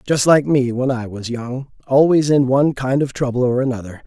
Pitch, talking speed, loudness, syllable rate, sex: 130 Hz, 205 wpm, -17 LUFS, 5.3 syllables/s, male